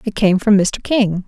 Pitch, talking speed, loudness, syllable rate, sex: 205 Hz, 235 wpm, -15 LUFS, 4.3 syllables/s, female